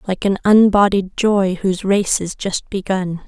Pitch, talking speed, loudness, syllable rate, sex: 195 Hz, 165 wpm, -17 LUFS, 4.4 syllables/s, female